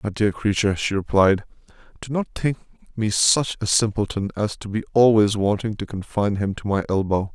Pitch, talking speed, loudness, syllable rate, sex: 105 Hz, 190 wpm, -21 LUFS, 5.2 syllables/s, male